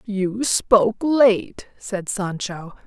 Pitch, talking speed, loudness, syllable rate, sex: 205 Hz, 105 wpm, -20 LUFS, 2.8 syllables/s, female